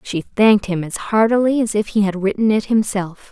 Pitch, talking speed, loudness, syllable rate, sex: 205 Hz, 215 wpm, -17 LUFS, 5.3 syllables/s, female